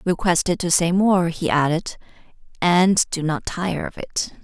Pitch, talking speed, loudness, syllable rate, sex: 175 Hz, 165 wpm, -20 LUFS, 4.2 syllables/s, female